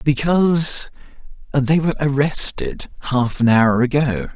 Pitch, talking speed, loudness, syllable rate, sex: 140 Hz, 110 wpm, -17 LUFS, 4.2 syllables/s, male